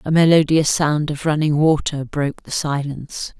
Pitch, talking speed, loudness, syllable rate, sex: 150 Hz, 160 wpm, -18 LUFS, 4.9 syllables/s, female